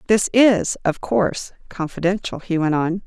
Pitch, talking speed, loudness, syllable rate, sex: 185 Hz, 155 wpm, -19 LUFS, 4.6 syllables/s, female